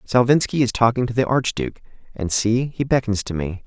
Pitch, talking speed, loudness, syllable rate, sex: 120 Hz, 195 wpm, -20 LUFS, 5.6 syllables/s, male